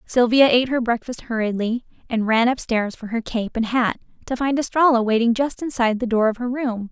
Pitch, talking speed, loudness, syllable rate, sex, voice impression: 240 Hz, 210 wpm, -20 LUFS, 5.6 syllables/s, female, feminine, slightly young, tensed, powerful, bright, clear, fluent, slightly cute, friendly, lively, slightly sharp